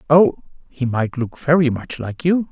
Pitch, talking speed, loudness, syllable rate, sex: 140 Hz, 190 wpm, -19 LUFS, 4.5 syllables/s, male